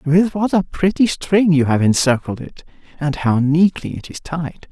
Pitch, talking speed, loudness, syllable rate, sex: 160 Hz, 180 wpm, -17 LUFS, 4.5 syllables/s, male